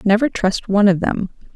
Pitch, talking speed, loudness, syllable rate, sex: 205 Hz, 195 wpm, -17 LUFS, 5.7 syllables/s, female